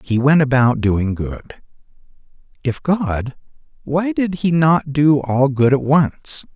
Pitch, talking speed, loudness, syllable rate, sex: 140 Hz, 145 wpm, -17 LUFS, 3.5 syllables/s, male